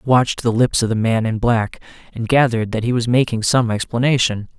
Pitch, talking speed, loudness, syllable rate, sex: 115 Hz, 225 wpm, -17 LUFS, 5.9 syllables/s, male